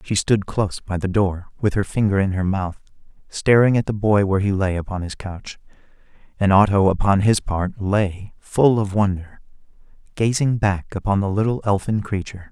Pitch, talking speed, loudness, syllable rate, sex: 100 Hz, 180 wpm, -20 LUFS, 5.1 syllables/s, male